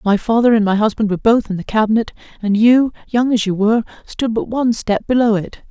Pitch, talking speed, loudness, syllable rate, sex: 220 Hz, 230 wpm, -16 LUFS, 6.1 syllables/s, female